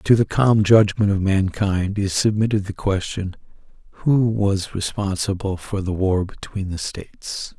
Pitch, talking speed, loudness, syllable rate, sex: 100 Hz, 150 wpm, -20 LUFS, 4.2 syllables/s, male